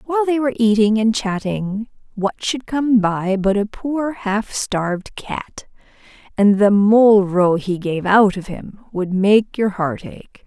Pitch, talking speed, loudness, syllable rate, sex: 210 Hz, 170 wpm, -17 LUFS, 3.8 syllables/s, female